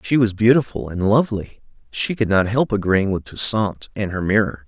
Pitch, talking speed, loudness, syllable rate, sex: 105 Hz, 195 wpm, -19 LUFS, 5.4 syllables/s, male